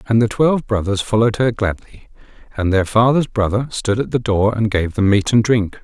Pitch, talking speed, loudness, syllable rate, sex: 110 Hz, 215 wpm, -17 LUFS, 5.4 syllables/s, male